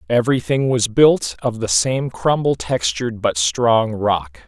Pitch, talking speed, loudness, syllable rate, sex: 115 Hz, 145 wpm, -18 LUFS, 4.0 syllables/s, male